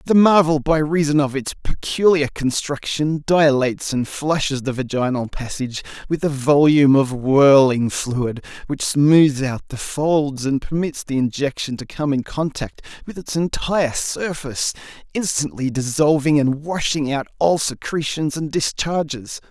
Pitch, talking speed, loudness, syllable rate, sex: 145 Hz, 140 wpm, -19 LUFS, 4.4 syllables/s, male